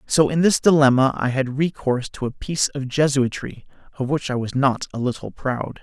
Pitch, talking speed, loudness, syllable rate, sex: 135 Hz, 205 wpm, -21 LUFS, 5.3 syllables/s, male